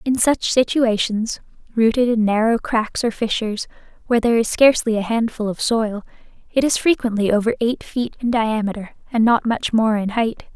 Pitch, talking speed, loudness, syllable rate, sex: 225 Hz, 175 wpm, -19 LUFS, 5.3 syllables/s, female